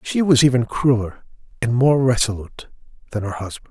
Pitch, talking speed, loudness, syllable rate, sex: 120 Hz, 160 wpm, -19 LUFS, 5.7 syllables/s, male